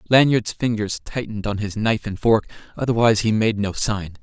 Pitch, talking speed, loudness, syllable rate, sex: 110 Hz, 185 wpm, -21 LUFS, 5.7 syllables/s, male